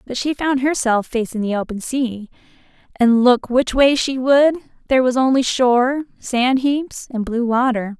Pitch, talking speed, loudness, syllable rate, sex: 250 Hz, 175 wpm, -17 LUFS, 4.5 syllables/s, female